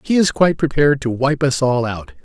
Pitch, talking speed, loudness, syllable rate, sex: 140 Hz, 240 wpm, -17 LUFS, 5.7 syllables/s, male